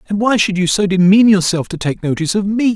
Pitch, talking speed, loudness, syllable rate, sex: 195 Hz, 260 wpm, -14 LUFS, 6.2 syllables/s, male